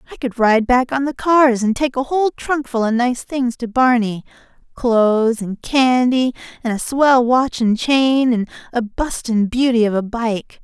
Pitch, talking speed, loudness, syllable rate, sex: 245 Hz, 185 wpm, -17 LUFS, 4.3 syllables/s, female